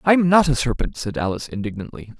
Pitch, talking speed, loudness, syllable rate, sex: 135 Hz, 190 wpm, -20 LUFS, 6.3 syllables/s, male